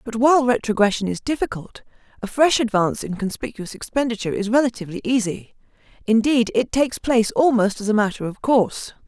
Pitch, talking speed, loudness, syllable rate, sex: 230 Hz, 160 wpm, -20 LUFS, 6.2 syllables/s, female